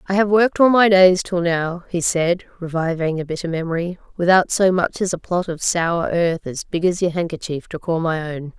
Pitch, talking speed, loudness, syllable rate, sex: 175 Hz, 225 wpm, -19 LUFS, 5.2 syllables/s, female